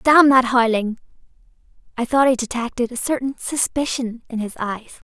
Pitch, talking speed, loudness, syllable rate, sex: 245 Hz, 150 wpm, -19 LUFS, 5.0 syllables/s, female